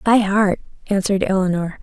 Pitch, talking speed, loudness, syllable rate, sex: 195 Hz, 130 wpm, -19 LUFS, 5.6 syllables/s, female